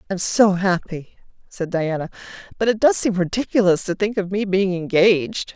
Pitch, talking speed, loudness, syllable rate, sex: 190 Hz, 175 wpm, -19 LUFS, 5.1 syllables/s, female